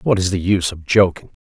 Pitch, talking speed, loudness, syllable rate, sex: 95 Hz, 250 wpm, -17 LUFS, 6.5 syllables/s, male